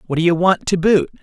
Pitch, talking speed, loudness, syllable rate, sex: 175 Hz, 295 wpm, -16 LUFS, 6.3 syllables/s, male